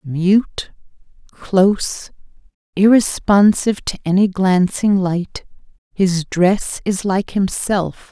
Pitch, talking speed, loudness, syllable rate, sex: 190 Hz, 90 wpm, -16 LUFS, 3.2 syllables/s, female